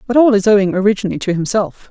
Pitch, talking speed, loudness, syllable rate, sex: 205 Hz, 220 wpm, -14 LUFS, 7.3 syllables/s, female